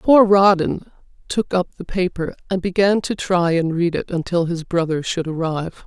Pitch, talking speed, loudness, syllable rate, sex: 180 Hz, 185 wpm, -19 LUFS, 4.8 syllables/s, female